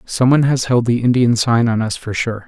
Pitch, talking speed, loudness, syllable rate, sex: 120 Hz, 265 wpm, -15 LUFS, 5.5 syllables/s, male